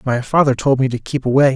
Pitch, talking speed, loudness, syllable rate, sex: 135 Hz, 270 wpm, -16 LUFS, 6.3 syllables/s, male